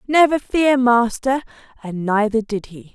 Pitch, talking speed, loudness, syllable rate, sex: 240 Hz, 140 wpm, -18 LUFS, 4.2 syllables/s, female